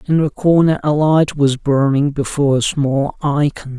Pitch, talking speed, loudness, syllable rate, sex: 145 Hz, 175 wpm, -15 LUFS, 4.6 syllables/s, male